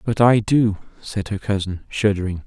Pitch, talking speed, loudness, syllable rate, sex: 105 Hz, 170 wpm, -20 LUFS, 4.7 syllables/s, male